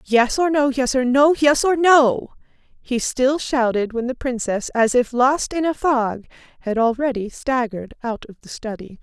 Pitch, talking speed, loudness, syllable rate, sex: 255 Hz, 185 wpm, -19 LUFS, 4.4 syllables/s, female